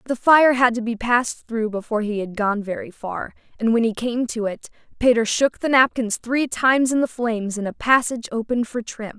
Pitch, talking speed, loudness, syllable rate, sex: 235 Hz, 220 wpm, -20 LUFS, 5.5 syllables/s, female